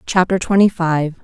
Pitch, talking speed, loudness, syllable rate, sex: 175 Hz, 145 wpm, -16 LUFS, 4.6 syllables/s, female